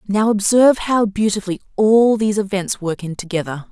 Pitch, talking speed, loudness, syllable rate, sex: 205 Hz, 160 wpm, -17 LUFS, 5.6 syllables/s, female